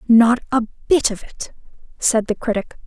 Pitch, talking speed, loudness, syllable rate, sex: 230 Hz, 165 wpm, -19 LUFS, 4.3 syllables/s, female